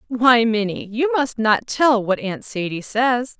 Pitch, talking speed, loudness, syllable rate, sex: 230 Hz, 175 wpm, -19 LUFS, 3.9 syllables/s, female